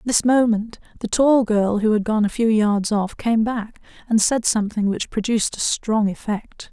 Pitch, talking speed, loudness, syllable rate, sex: 220 Hz, 205 wpm, -20 LUFS, 4.7 syllables/s, female